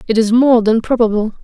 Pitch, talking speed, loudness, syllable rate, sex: 225 Hz, 210 wpm, -13 LUFS, 5.8 syllables/s, female